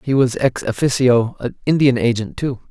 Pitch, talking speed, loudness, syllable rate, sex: 125 Hz, 155 wpm, -17 LUFS, 5.0 syllables/s, male